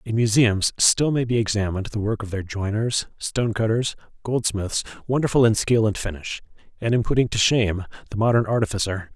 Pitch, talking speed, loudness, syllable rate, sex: 110 Hz, 175 wpm, -22 LUFS, 5.7 syllables/s, male